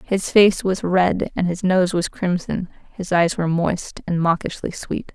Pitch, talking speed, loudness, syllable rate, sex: 180 Hz, 185 wpm, -20 LUFS, 4.2 syllables/s, female